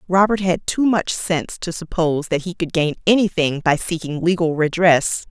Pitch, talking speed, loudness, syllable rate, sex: 170 Hz, 180 wpm, -19 LUFS, 5.1 syllables/s, female